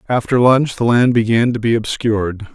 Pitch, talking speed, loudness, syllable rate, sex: 115 Hz, 190 wpm, -15 LUFS, 5.1 syllables/s, male